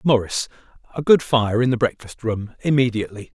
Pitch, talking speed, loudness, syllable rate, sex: 120 Hz, 160 wpm, -20 LUFS, 5.6 syllables/s, male